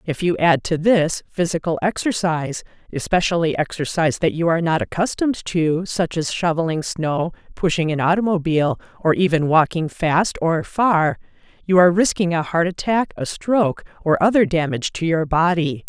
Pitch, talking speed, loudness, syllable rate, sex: 170 Hz, 150 wpm, -19 LUFS, 5.2 syllables/s, female